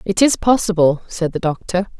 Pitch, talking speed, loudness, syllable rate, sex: 185 Hz, 180 wpm, -17 LUFS, 5.1 syllables/s, female